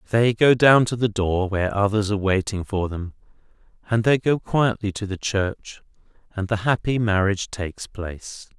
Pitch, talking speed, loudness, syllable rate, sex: 105 Hz, 175 wpm, -22 LUFS, 4.9 syllables/s, male